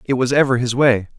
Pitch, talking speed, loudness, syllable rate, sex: 125 Hz, 255 wpm, -16 LUFS, 6.0 syllables/s, male